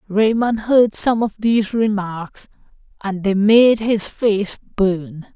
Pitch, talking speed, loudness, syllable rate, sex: 210 Hz, 135 wpm, -17 LUFS, 3.3 syllables/s, female